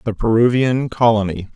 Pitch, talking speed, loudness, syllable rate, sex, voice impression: 115 Hz, 115 wpm, -16 LUFS, 5.0 syllables/s, male, very masculine, middle-aged, thick, slightly muffled, fluent, cool, slightly intellectual, slightly kind